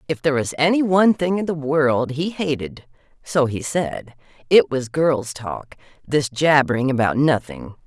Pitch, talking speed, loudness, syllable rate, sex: 140 Hz, 155 wpm, -19 LUFS, 4.5 syllables/s, female